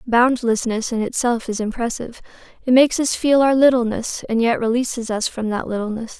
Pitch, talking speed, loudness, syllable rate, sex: 235 Hz, 175 wpm, -19 LUFS, 5.5 syllables/s, female